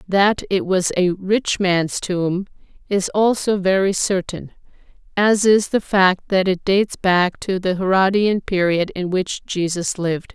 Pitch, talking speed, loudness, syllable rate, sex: 190 Hz, 155 wpm, -18 LUFS, 4.0 syllables/s, female